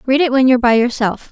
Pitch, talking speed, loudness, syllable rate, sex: 250 Hz, 275 wpm, -14 LUFS, 6.8 syllables/s, female